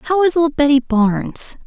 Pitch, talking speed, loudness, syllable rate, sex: 290 Hz, 180 wpm, -16 LUFS, 4.5 syllables/s, female